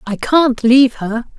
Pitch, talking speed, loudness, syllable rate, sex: 245 Hz, 175 wpm, -13 LUFS, 4.2 syllables/s, female